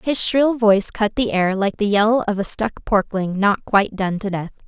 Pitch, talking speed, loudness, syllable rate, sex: 210 Hz, 230 wpm, -19 LUFS, 5.0 syllables/s, female